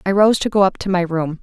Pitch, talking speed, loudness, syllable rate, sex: 185 Hz, 335 wpm, -17 LUFS, 6.0 syllables/s, female